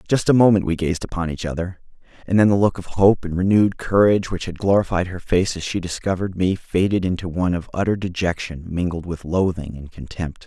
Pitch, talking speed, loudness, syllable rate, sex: 90 Hz, 210 wpm, -20 LUFS, 5.9 syllables/s, male